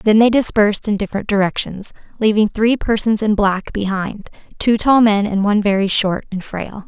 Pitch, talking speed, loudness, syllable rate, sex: 205 Hz, 185 wpm, -16 LUFS, 5.2 syllables/s, female